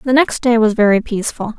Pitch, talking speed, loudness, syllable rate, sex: 230 Hz, 225 wpm, -15 LUFS, 5.9 syllables/s, female